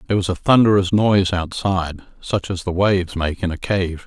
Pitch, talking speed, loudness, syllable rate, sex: 95 Hz, 205 wpm, -19 LUFS, 5.7 syllables/s, male